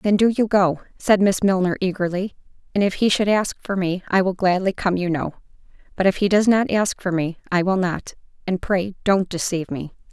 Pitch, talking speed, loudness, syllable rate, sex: 190 Hz, 215 wpm, -21 LUFS, 5.4 syllables/s, female